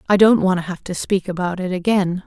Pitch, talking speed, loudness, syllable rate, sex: 185 Hz, 265 wpm, -19 LUFS, 5.7 syllables/s, female